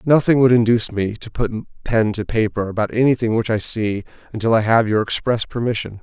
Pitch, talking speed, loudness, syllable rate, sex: 110 Hz, 200 wpm, -19 LUFS, 5.5 syllables/s, male